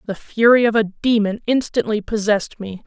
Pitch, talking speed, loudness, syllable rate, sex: 215 Hz, 165 wpm, -18 LUFS, 5.3 syllables/s, female